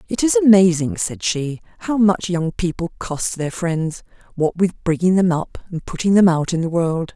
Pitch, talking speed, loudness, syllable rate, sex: 175 Hz, 200 wpm, -18 LUFS, 4.6 syllables/s, female